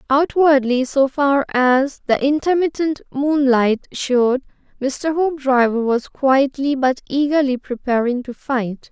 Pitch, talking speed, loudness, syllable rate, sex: 270 Hz, 115 wpm, -18 LUFS, 3.9 syllables/s, female